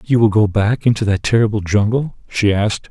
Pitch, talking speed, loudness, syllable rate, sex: 110 Hz, 205 wpm, -16 LUFS, 5.5 syllables/s, male